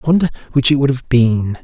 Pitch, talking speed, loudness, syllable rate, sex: 135 Hz, 255 wpm, -15 LUFS, 6.4 syllables/s, male